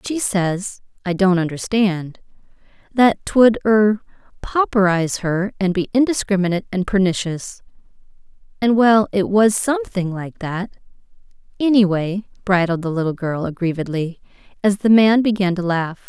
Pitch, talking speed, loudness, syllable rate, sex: 195 Hz, 115 wpm, -18 LUFS, 4.7 syllables/s, female